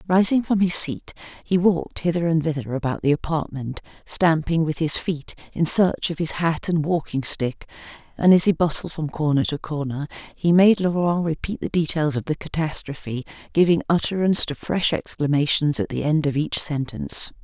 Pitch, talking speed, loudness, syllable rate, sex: 160 Hz, 180 wpm, -22 LUFS, 5.2 syllables/s, female